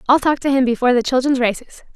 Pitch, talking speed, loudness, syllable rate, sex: 260 Hz, 245 wpm, -17 LUFS, 7.0 syllables/s, female